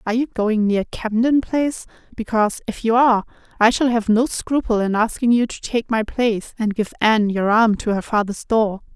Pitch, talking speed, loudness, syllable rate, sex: 225 Hz, 210 wpm, -19 LUFS, 5.3 syllables/s, female